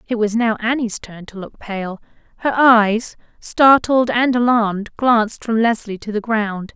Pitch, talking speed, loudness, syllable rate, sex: 225 Hz, 170 wpm, -17 LUFS, 4.2 syllables/s, female